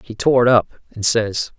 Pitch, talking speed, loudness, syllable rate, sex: 115 Hz, 225 wpm, -17 LUFS, 4.4 syllables/s, male